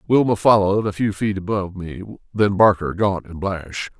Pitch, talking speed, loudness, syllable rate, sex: 95 Hz, 180 wpm, -19 LUFS, 5.2 syllables/s, male